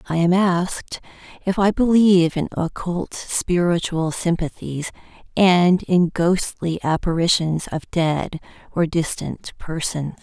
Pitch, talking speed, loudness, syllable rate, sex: 175 Hz, 110 wpm, -20 LUFS, 3.9 syllables/s, female